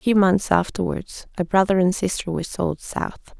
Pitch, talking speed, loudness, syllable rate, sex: 190 Hz, 195 wpm, -22 LUFS, 5.2 syllables/s, female